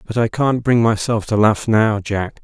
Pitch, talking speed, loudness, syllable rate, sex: 110 Hz, 220 wpm, -17 LUFS, 4.5 syllables/s, male